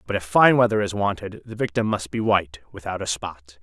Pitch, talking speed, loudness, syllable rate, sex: 100 Hz, 230 wpm, -22 LUFS, 5.7 syllables/s, male